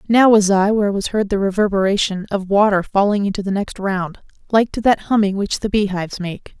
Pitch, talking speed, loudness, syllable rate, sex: 200 Hz, 210 wpm, -17 LUFS, 5.6 syllables/s, female